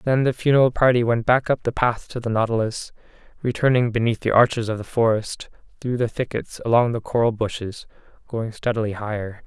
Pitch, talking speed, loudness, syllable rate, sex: 115 Hz, 185 wpm, -21 LUFS, 5.7 syllables/s, male